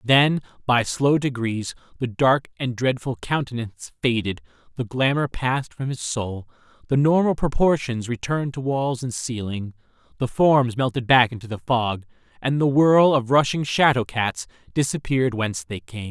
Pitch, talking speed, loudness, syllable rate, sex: 125 Hz, 155 wpm, -22 LUFS, 4.7 syllables/s, male